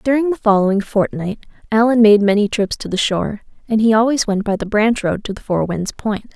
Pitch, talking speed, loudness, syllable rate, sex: 210 Hz, 215 wpm, -17 LUFS, 5.6 syllables/s, female